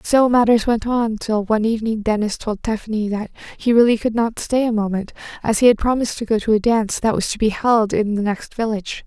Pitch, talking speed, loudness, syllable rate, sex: 220 Hz, 240 wpm, -19 LUFS, 5.9 syllables/s, female